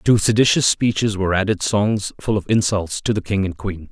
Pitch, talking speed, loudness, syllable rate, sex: 100 Hz, 215 wpm, -19 LUFS, 5.3 syllables/s, male